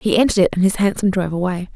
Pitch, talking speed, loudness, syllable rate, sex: 190 Hz, 275 wpm, -18 LUFS, 7.8 syllables/s, female